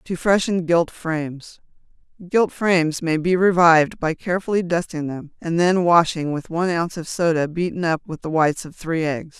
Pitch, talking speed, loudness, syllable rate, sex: 165 Hz, 180 wpm, -20 LUFS, 5.1 syllables/s, female